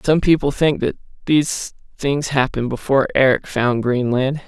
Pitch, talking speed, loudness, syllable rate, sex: 135 Hz, 145 wpm, -18 LUFS, 4.9 syllables/s, male